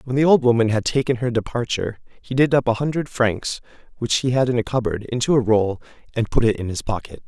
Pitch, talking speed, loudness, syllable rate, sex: 120 Hz, 240 wpm, -21 LUFS, 6.1 syllables/s, male